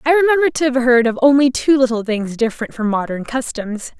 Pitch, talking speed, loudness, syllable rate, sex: 250 Hz, 210 wpm, -16 LUFS, 5.8 syllables/s, female